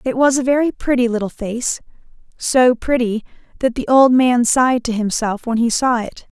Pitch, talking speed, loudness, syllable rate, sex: 245 Hz, 190 wpm, -16 LUFS, 5.0 syllables/s, female